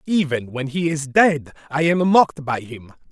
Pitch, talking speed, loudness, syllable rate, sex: 150 Hz, 195 wpm, -19 LUFS, 4.5 syllables/s, male